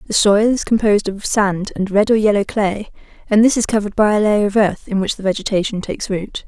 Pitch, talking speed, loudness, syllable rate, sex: 205 Hz, 240 wpm, -16 LUFS, 5.9 syllables/s, female